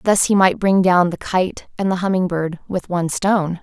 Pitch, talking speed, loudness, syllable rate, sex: 185 Hz, 230 wpm, -18 LUFS, 5.1 syllables/s, female